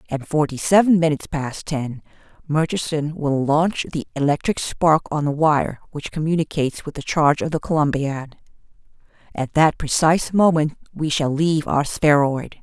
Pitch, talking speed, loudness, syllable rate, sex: 150 Hz, 150 wpm, -20 LUFS, 4.9 syllables/s, female